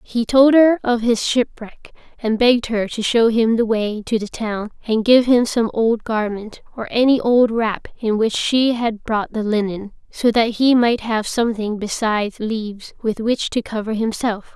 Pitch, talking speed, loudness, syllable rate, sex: 225 Hz, 195 wpm, -18 LUFS, 4.4 syllables/s, female